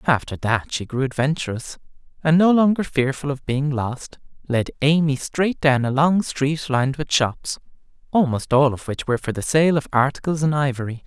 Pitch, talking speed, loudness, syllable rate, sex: 140 Hz, 185 wpm, -21 LUFS, 5.1 syllables/s, male